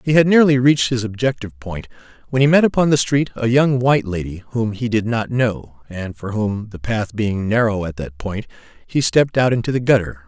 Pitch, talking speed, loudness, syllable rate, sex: 115 Hz, 220 wpm, -18 LUFS, 5.4 syllables/s, male